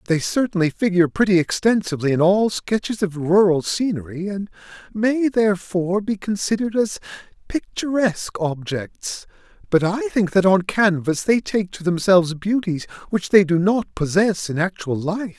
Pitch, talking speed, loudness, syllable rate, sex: 190 Hz, 150 wpm, -20 LUFS, 4.9 syllables/s, male